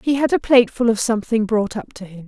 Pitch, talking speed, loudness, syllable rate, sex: 225 Hz, 265 wpm, -18 LUFS, 6.5 syllables/s, female